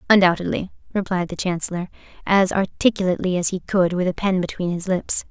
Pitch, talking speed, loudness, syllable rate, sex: 185 Hz, 170 wpm, -21 LUFS, 6.0 syllables/s, female